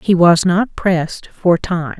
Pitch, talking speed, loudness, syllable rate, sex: 175 Hz, 180 wpm, -15 LUFS, 3.7 syllables/s, female